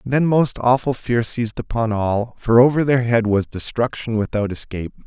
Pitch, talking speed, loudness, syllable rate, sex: 115 Hz, 180 wpm, -19 LUFS, 5.0 syllables/s, male